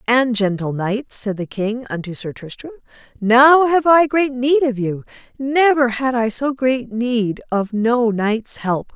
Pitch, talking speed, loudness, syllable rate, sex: 240 Hz, 175 wpm, -17 LUFS, 3.8 syllables/s, female